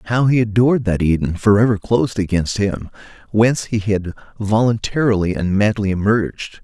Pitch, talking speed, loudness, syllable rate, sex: 105 Hz, 145 wpm, -17 LUFS, 5.4 syllables/s, male